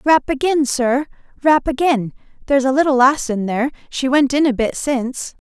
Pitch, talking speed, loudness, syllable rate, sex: 270 Hz, 185 wpm, -17 LUFS, 5.3 syllables/s, female